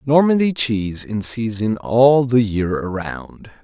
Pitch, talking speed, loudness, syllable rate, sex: 115 Hz, 130 wpm, -18 LUFS, 3.8 syllables/s, male